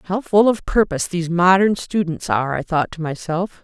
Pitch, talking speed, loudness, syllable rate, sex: 180 Hz, 200 wpm, -19 LUFS, 5.5 syllables/s, female